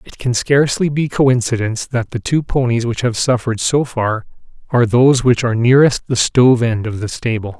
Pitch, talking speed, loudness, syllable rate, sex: 120 Hz, 200 wpm, -15 LUFS, 5.7 syllables/s, male